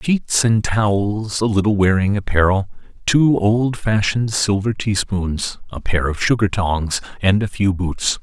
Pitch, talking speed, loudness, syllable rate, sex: 100 Hz, 145 wpm, -18 LUFS, 4.1 syllables/s, male